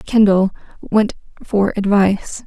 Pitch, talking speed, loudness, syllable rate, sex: 200 Hz, 100 wpm, -16 LUFS, 4.0 syllables/s, female